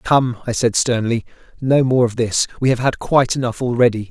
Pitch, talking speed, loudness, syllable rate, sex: 120 Hz, 205 wpm, -18 LUFS, 5.4 syllables/s, male